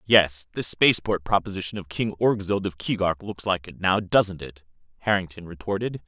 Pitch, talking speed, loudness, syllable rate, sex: 95 Hz, 170 wpm, -24 LUFS, 5.1 syllables/s, male